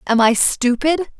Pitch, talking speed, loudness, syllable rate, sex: 265 Hz, 150 wpm, -16 LUFS, 3.9 syllables/s, female